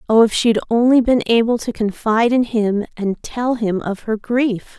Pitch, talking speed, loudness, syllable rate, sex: 225 Hz, 215 wpm, -17 LUFS, 4.8 syllables/s, female